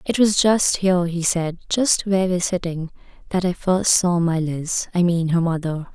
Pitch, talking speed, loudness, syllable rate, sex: 175 Hz, 190 wpm, -20 LUFS, 4.7 syllables/s, female